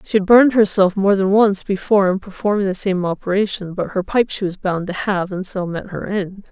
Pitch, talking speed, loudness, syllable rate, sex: 195 Hz, 240 wpm, -18 LUFS, 5.5 syllables/s, female